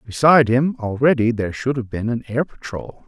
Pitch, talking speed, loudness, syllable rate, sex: 125 Hz, 195 wpm, -19 LUFS, 5.6 syllables/s, male